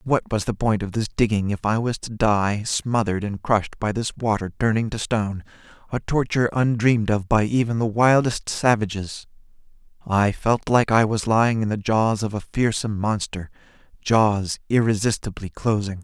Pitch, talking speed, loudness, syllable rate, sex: 110 Hz, 170 wpm, -22 LUFS, 5.1 syllables/s, male